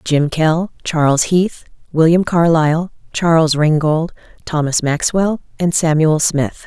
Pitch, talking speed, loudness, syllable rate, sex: 160 Hz, 115 wpm, -15 LUFS, 4.0 syllables/s, female